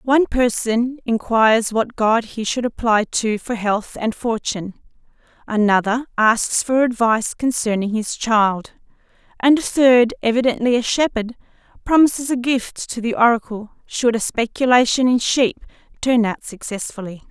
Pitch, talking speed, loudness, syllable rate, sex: 230 Hz, 140 wpm, -18 LUFS, 4.6 syllables/s, female